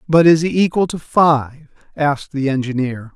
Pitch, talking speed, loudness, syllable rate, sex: 150 Hz, 170 wpm, -16 LUFS, 5.0 syllables/s, male